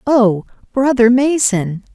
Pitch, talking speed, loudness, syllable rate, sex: 235 Hz, 95 wpm, -14 LUFS, 3.4 syllables/s, female